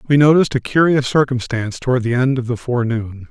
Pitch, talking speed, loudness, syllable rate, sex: 125 Hz, 200 wpm, -17 LUFS, 6.4 syllables/s, male